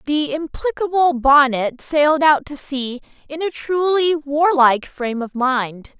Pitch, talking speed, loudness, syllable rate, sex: 290 Hz, 140 wpm, -18 LUFS, 4.1 syllables/s, female